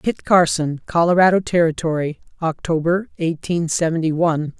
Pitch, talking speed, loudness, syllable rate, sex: 165 Hz, 105 wpm, -19 LUFS, 5.0 syllables/s, female